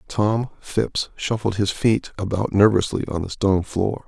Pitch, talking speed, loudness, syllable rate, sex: 100 Hz, 160 wpm, -22 LUFS, 4.3 syllables/s, male